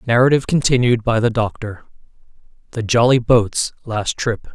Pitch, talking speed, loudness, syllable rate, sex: 115 Hz, 130 wpm, -17 LUFS, 5.0 syllables/s, male